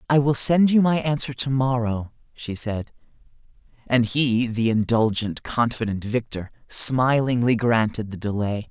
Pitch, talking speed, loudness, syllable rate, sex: 120 Hz, 140 wpm, -22 LUFS, 4.3 syllables/s, male